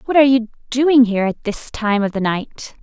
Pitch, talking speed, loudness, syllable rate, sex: 235 Hz, 235 wpm, -17 LUFS, 5.4 syllables/s, female